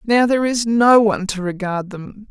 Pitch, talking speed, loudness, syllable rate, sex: 210 Hz, 210 wpm, -17 LUFS, 5.0 syllables/s, female